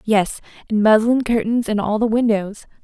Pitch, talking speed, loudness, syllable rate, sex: 215 Hz, 170 wpm, -18 LUFS, 4.7 syllables/s, female